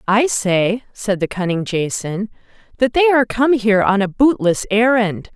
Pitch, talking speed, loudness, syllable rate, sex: 215 Hz, 170 wpm, -17 LUFS, 4.7 syllables/s, female